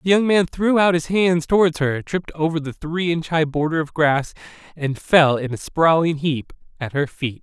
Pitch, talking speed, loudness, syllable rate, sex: 160 Hz, 220 wpm, -19 LUFS, 4.8 syllables/s, male